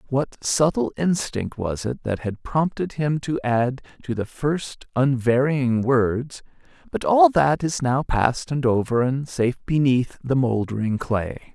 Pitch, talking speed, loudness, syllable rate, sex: 130 Hz, 155 wpm, -22 LUFS, 3.9 syllables/s, male